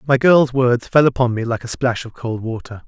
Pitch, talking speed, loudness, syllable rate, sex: 125 Hz, 250 wpm, -17 LUFS, 5.2 syllables/s, male